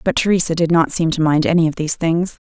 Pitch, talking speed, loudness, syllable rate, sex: 165 Hz, 265 wpm, -16 LUFS, 6.5 syllables/s, female